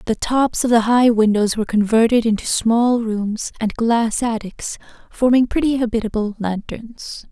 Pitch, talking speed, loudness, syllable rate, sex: 230 Hz, 150 wpm, -18 LUFS, 4.5 syllables/s, female